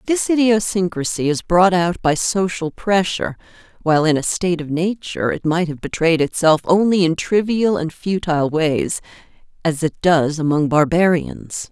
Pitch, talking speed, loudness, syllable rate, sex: 170 Hz, 155 wpm, -18 LUFS, 4.8 syllables/s, female